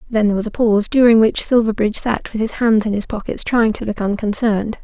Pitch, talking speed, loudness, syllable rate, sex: 220 Hz, 235 wpm, -17 LUFS, 6.3 syllables/s, female